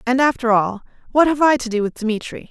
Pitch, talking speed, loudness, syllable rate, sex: 245 Hz, 240 wpm, -18 LUFS, 5.8 syllables/s, female